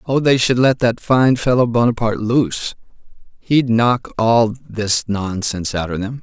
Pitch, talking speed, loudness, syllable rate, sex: 115 Hz, 155 wpm, -17 LUFS, 4.6 syllables/s, male